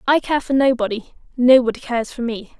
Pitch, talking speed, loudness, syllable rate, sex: 245 Hz, 185 wpm, -18 LUFS, 6.9 syllables/s, female